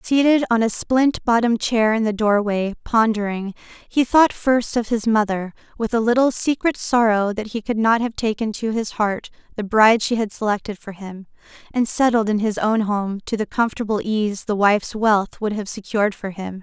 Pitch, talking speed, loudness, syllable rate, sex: 220 Hz, 200 wpm, -20 LUFS, 5.0 syllables/s, female